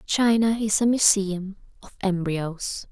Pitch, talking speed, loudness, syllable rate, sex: 200 Hz, 125 wpm, -22 LUFS, 3.6 syllables/s, female